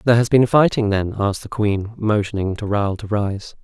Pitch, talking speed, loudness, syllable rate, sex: 105 Hz, 215 wpm, -19 LUFS, 5.3 syllables/s, male